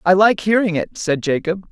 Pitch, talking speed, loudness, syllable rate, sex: 185 Hz, 210 wpm, -17 LUFS, 5.0 syllables/s, female